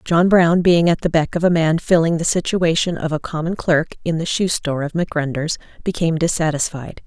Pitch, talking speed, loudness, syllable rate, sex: 165 Hz, 205 wpm, -18 LUFS, 4.6 syllables/s, female